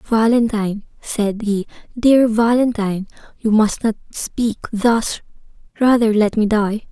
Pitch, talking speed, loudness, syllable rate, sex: 220 Hz, 115 wpm, -17 LUFS, 4.0 syllables/s, female